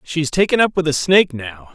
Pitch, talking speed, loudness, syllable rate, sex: 155 Hz, 275 wpm, -16 LUFS, 6.1 syllables/s, male